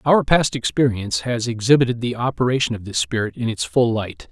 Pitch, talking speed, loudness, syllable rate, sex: 120 Hz, 195 wpm, -20 LUFS, 5.7 syllables/s, male